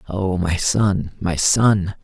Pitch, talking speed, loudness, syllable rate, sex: 95 Hz, 145 wpm, -19 LUFS, 2.8 syllables/s, male